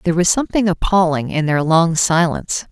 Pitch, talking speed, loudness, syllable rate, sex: 170 Hz, 175 wpm, -16 LUFS, 5.9 syllables/s, female